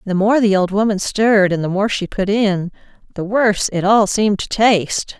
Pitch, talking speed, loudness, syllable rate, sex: 200 Hz, 220 wpm, -16 LUFS, 5.2 syllables/s, female